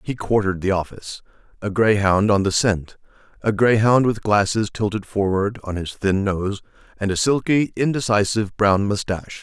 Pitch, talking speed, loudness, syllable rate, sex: 105 Hz, 160 wpm, -20 LUFS, 5.1 syllables/s, male